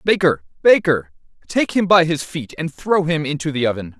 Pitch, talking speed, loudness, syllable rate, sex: 165 Hz, 195 wpm, -18 LUFS, 5.1 syllables/s, male